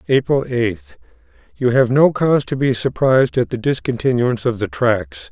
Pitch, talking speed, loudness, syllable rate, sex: 125 Hz, 160 wpm, -17 LUFS, 5.1 syllables/s, male